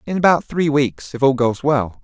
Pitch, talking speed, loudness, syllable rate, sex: 135 Hz, 235 wpm, -18 LUFS, 4.8 syllables/s, male